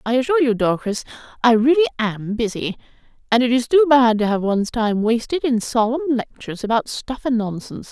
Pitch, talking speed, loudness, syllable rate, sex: 240 Hz, 190 wpm, -19 LUFS, 5.8 syllables/s, female